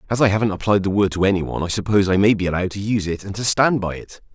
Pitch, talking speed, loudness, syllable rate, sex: 100 Hz, 305 wpm, -19 LUFS, 7.7 syllables/s, male